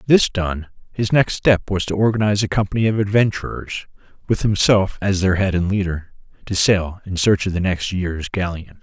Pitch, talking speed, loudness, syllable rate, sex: 95 Hz, 190 wpm, -19 LUFS, 5.1 syllables/s, male